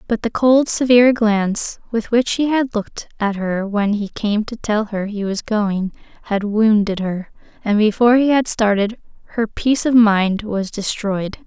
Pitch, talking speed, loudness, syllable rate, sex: 215 Hz, 185 wpm, -17 LUFS, 4.5 syllables/s, female